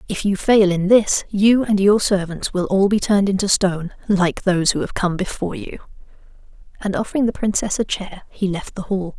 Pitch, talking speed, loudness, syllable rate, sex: 195 Hz, 210 wpm, -19 LUFS, 5.4 syllables/s, female